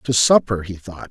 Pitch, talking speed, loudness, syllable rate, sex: 110 Hz, 215 wpm, -17 LUFS, 5.0 syllables/s, male